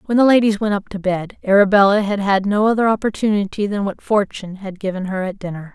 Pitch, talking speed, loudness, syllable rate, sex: 200 Hz, 220 wpm, -17 LUFS, 6.1 syllables/s, female